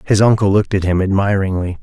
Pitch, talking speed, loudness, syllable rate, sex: 100 Hz, 195 wpm, -15 LUFS, 6.4 syllables/s, male